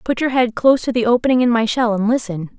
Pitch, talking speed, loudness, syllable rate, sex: 235 Hz, 280 wpm, -16 LUFS, 6.4 syllables/s, female